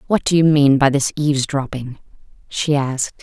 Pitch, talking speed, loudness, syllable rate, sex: 140 Hz, 165 wpm, -17 LUFS, 5.4 syllables/s, female